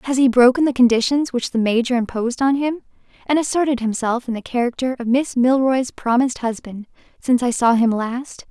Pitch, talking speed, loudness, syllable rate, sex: 250 Hz, 190 wpm, -18 LUFS, 5.7 syllables/s, female